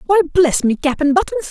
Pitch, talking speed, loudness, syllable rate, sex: 320 Hz, 240 wpm, -15 LUFS, 5.7 syllables/s, female